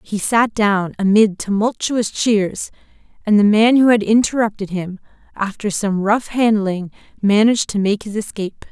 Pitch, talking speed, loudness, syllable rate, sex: 210 Hz, 150 wpm, -17 LUFS, 4.6 syllables/s, female